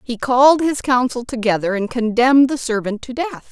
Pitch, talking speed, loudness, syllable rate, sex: 245 Hz, 190 wpm, -17 LUFS, 5.3 syllables/s, female